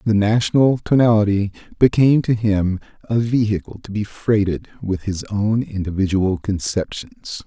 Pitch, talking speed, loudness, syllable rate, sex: 105 Hz, 130 wpm, -19 LUFS, 4.7 syllables/s, male